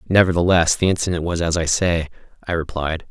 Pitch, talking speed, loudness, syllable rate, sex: 85 Hz, 175 wpm, -19 LUFS, 6.0 syllables/s, male